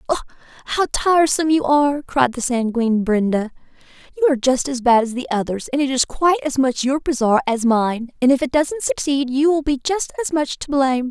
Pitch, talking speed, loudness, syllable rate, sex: 270 Hz, 205 wpm, -18 LUFS, 5.5 syllables/s, female